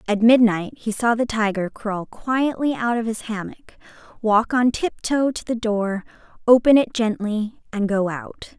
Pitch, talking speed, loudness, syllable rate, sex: 220 Hz, 175 wpm, -21 LUFS, 4.4 syllables/s, female